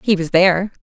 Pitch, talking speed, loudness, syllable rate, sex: 185 Hz, 220 wpm, -15 LUFS, 6.1 syllables/s, female